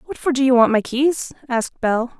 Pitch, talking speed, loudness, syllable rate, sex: 255 Hz, 245 wpm, -19 LUFS, 5.1 syllables/s, female